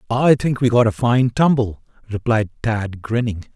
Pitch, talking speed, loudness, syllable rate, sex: 115 Hz, 170 wpm, -18 LUFS, 4.6 syllables/s, male